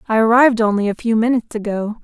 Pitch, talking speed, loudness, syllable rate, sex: 225 Hz, 205 wpm, -16 LUFS, 7.2 syllables/s, female